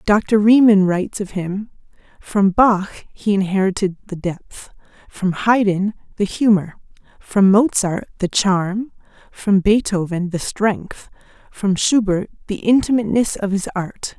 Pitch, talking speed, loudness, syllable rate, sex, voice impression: 200 Hz, 125 wpm, -18 LUFS, 3.9 syllables/s, female, feminine, adult-like, slightly clear, slightly refreshing, sincere